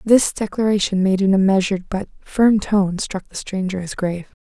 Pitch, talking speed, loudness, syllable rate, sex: 195 Hz, 190 wpm, -19 LUFS, 5.2 syllables/s, female